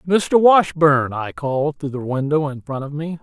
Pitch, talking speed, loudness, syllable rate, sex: 150 Hz, 205 wpm, -18 LUFS, 4.6 syllables/s, male